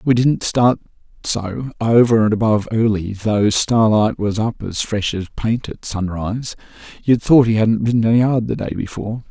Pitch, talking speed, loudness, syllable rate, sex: 110 Hz, 180 wpm, -17 LUFS, 4.8 syllables/s, male